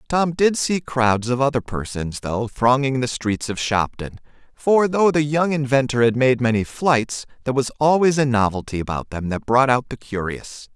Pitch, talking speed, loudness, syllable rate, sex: 130 Hz, 190 wpm, -20 LUFS, 4.7 syllables/s, male